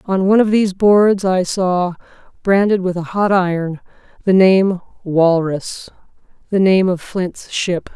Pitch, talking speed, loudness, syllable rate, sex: 185 Hz, 145 wpm, -16 LUFS, 4.1 syllables/s, female